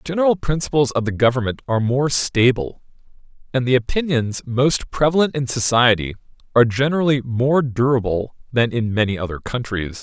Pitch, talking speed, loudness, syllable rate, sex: 125 Hz, 155 wpm, -19 LUFS, 5.6 syllables/s, male